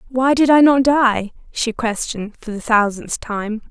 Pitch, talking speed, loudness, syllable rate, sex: 235 Hz, 180 wpm, -17 LUFS, 4.3 syllables/s, female